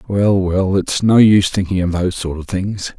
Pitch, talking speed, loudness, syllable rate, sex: 95 Hz, 220 wpm, -16 LUFS, 5.0 syllables/s, male